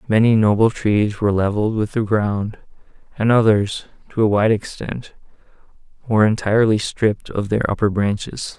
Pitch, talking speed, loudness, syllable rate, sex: 105 Hz, 145 wpm, -18 LUFS, 5.2 syllables/s, male